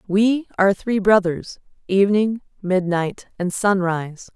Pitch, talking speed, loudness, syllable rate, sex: 195 Hz, 95 wpm, -20 LUFS, 4.3 syllables/s, female